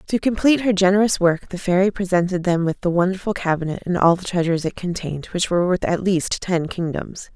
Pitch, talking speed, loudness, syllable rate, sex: 180 Hz, 210 wpm, -20 LUFS, 6.0 syllables/s, female